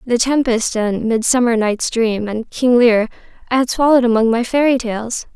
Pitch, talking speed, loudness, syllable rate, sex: 235 Hz, 180 wpm, -16 LUFS, 4.8 syllables/s, female